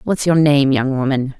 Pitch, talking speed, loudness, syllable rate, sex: 140 Hz, 215 wpm, -15 LUFS, 4.7 syllables/s, female